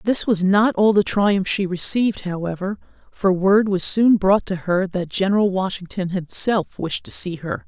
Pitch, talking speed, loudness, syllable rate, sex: 195 Hz, 190 wpm, -19 LUFS, 4.6 syllables/s, female